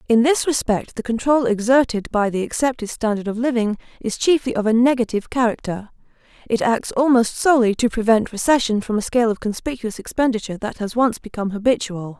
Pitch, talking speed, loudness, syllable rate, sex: 230 Hz, 175 wpm, -19 LUFS, 6.0 syllables/s, female